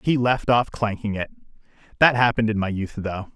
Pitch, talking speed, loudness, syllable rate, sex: 110 Hz, 195 wpm, -22 LUFS, 5.7 syllables/s, male